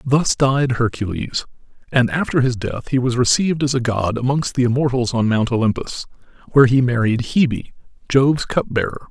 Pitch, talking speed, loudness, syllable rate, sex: 125 Hz, 165 wpm, -18 LUFS, 5.5 syllables/s, male